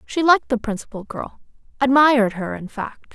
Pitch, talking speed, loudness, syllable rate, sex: 245 Hz, 155 wpm, -19 LUFS, 5.5 syllables/s, female